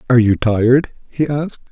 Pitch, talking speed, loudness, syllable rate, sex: 125 Hz, 175 wpm, -16 LUFS, 6.0 syllables/s, male